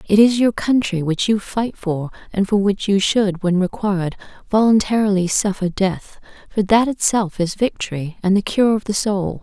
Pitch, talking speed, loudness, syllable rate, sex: 200 Hz, 185 wpm, -18 LUFS, 4.8 syllables/s, female